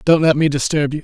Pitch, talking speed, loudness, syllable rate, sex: 150 Hz, 290 wpm, -16 LUFS, 6.5 syllables/s, male